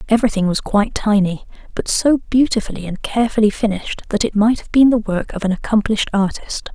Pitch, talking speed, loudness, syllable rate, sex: 215 Hz, 185 wpm, -17 LUFS, 6.2 syllables/s, female